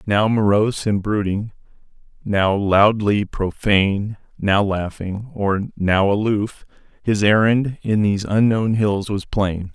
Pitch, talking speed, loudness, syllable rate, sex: 105 Hz, 125 wpm, -19 LUFS, 3.8 syllables/s, male